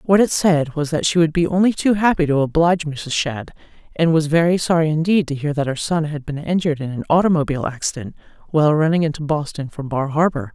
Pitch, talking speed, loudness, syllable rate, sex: 155 Hz, 220 wpm, -18 LUFS, 6.1 syllables/s, female